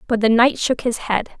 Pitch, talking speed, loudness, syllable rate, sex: 235 Hz, 255 wpm, -18 LUFS, 5.2 syllables/s, female